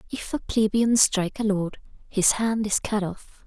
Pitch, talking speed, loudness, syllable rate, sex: 210 Hz, 190 wpm, -23 LUFS, 4.4 syllables/s, female